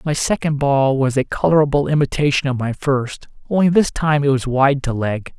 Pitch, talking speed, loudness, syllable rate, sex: 140 Hz, 200 wpm, -17 LUFS, 5.2 syllables/s, male